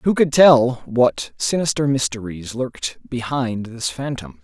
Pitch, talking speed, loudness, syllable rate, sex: 125 Hz, 135 wpm, -19 LUFS, 3.9 syllables/s, male